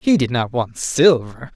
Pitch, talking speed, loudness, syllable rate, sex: 135 Hz, 195 wpm, -17 LUFS, 4.2 syllables/s, male